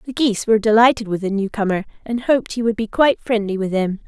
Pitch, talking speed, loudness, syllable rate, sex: 215 Hz, 235 wpm, -18 LUFS, 6.7 syllables/s, female